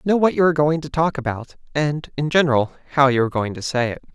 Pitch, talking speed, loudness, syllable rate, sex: 145 Hz, 260 wpm, -20 LUFS, 6.6 syllables/s, male